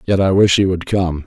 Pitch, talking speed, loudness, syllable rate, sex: 90 Hz, 285 wpm, -15 LUFS, 5.1 syllables/s, male